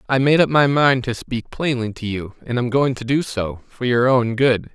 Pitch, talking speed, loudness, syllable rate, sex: 125 Hz, 240 wpm, -19 LUFS, 4.8 syllables/s, male